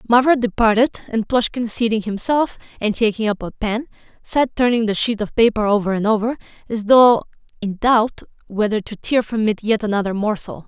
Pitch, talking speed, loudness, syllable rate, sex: 220 Hz, 180 wpm, -18 LUFS, 5.3 syllables/s, female